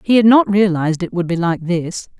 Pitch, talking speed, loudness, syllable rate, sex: 185 Hz, 245 wpm, -15 LUFS, 5.5 syllables/s, female